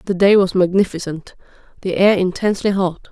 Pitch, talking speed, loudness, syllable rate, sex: 185 Hz, 155 wpm, -16 LUFS, 5.7 syllables/s, female